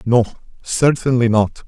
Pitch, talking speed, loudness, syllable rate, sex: 120 Hz, 105 wpm, -17 LUFS, 4.2 syllables/s, male